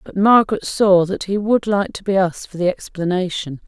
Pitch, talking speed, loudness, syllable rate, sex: 190 Hz, 210 wpm, -18 LUFS, 5.4 syllables/s, female